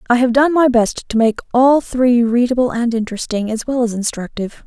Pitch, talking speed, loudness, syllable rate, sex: 240 Hz, 205 wpm, -16 LUFS, 5.5 syllables/s, female